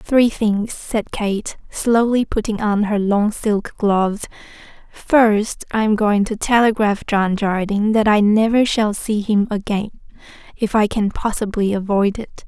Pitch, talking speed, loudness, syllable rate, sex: 210 Hz, 150 wpm, -18 LUFS, 4.0 syllables/s, female